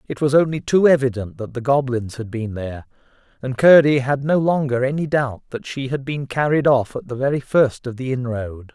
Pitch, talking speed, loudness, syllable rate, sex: 130 Hz, 215 wpm, -19 LUFS, 5.3 syllables/s, male